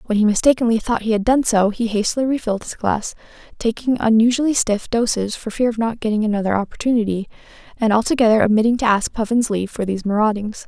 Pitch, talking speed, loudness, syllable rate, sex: 225 Hz, 190 wpm, -18 LUFS, 6.6 syllables/s, female